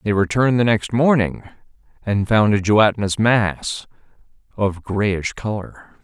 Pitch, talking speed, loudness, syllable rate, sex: 105 Hz, 120 wpm, -18 LUFS, 4.0 syllables/s, male